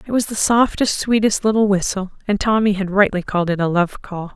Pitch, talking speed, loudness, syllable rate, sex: 200 Hz, 220 wpm, -18 LUFS, 5.7 syllables/s, female